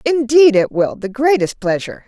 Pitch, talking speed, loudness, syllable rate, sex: 230 Hz, 175 wpm, -15 LUFS, 5.1 syllables/s, female